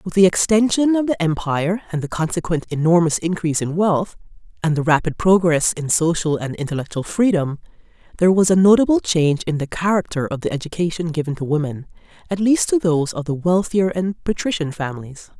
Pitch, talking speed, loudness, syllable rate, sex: 170 Hz, 180 wpm, -19 LUFS, 5.9 syllables/s, female